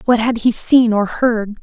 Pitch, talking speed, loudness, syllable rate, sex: 230 Hz, 220 wpm, -15 LUFS, 4.1 syllables/s, female